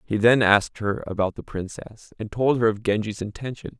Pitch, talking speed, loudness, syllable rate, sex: 110 Hz, 205 wpm, -23 LUFS, 5.3 syllables/s, male